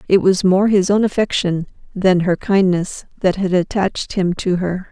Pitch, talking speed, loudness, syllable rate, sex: 185 Hz, 185 wpm, -17 LUFS, 4.7 syllables/s, female